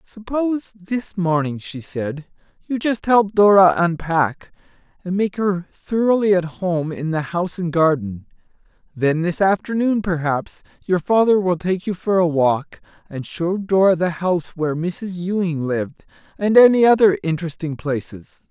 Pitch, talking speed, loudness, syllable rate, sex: 180 Hz, 150 wpm, -19 LUFS, 4.5 syllables/s, male